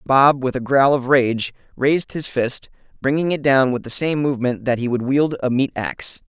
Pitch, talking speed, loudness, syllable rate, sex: 130 Hz, 215 wpm, -19 LUFS, 5.1 syllables/s, male